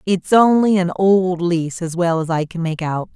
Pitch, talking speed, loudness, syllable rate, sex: 175 Hz, 230 wpm, -17 LUFS, 4.7 syllables/s, female